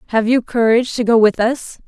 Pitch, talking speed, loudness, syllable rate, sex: 230 Hz, 225 wpm, -15 LUFS, 5.8 syllables/s, female